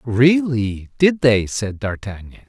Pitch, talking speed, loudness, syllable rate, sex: 120 Hz, 120 wpm, -18 LUFS, 3.6 syllables/s, male